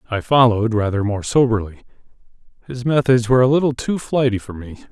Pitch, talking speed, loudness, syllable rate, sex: 120 Hz, 160 wpm, -17 LUFS, 6.4 syllables/s, male